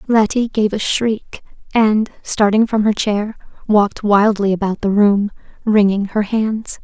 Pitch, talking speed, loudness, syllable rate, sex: 210 Hz, 150 wpm, -16 LUFS, 4.1 syllables/s, female